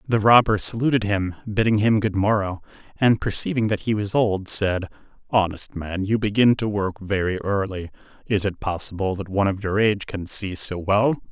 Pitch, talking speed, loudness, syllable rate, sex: 100 Hz, 185 wpm, -22 LUFS, 5.1 syllables/s, male